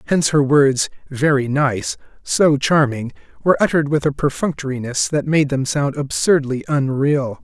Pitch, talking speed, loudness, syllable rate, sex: 140 Hz, 145 wpm, -18 LUFS, 4.8 syllables/s, male